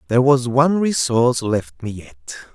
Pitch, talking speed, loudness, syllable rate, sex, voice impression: 125 Hz, 165 wpm, -17 LUFS, 5.1 syllables/s, male, masculine, adult-like, tensed, powerful, bright, clear, slightly raspy, intellectual, friendly, unique, lively